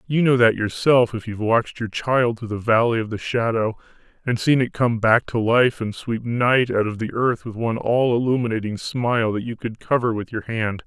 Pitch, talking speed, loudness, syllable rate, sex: 115 Hz, 225 wpm, -21 LUFS, 5.2 syllables/s, male